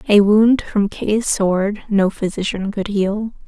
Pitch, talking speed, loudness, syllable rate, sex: 205 Hz, 155 wpm, -17 LUFS, 3.5 syllables/s, female